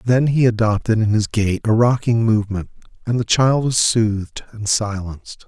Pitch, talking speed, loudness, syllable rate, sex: 110 Hz, 175 wpm, -18 LUFS, 4.9 syllables/s, male